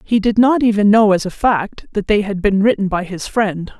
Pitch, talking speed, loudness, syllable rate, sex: 205 Hz, 255 wpm, -15 LUFS, 5.0 syllables/s, female